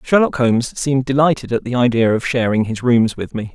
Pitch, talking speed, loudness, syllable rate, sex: 125 Hz, 220 wpm, -17 LUFS, 5.8 syllables/s, male